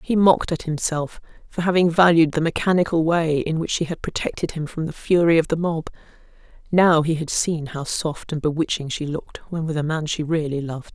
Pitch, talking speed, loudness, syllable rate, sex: 160 Hz, 215 wpm, -21 LUFS, 5.6 syllables/s, female